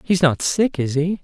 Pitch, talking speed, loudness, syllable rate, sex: 160 Hz, 245 wpm, -19 LUFS, 4.4 syllables/s, male